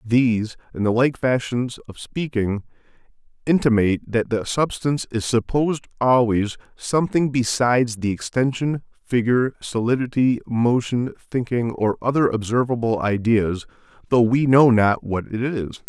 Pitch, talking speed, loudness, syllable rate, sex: 120 Hz, 125 wpm, -21 LUFS, 4.7 syllables/s, male